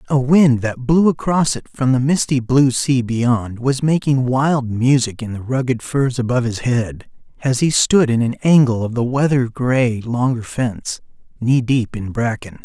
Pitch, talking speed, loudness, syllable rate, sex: 125 Hz, 185 wpm, -17 LUFS, 4.4 syllables/s, male